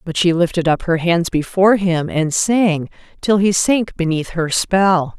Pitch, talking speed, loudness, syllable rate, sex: 180 Hz, 185 wpm, -16 LUFS, 4.2 syllables/s, female